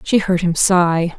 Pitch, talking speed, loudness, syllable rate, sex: 175 Hz, 200 wpm, -15 LUFS, 3.7 syllables/s, female